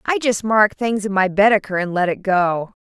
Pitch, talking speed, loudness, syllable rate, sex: 200 Hz, 235 wpm, -18 LUFS, 4.9 syllables/s, female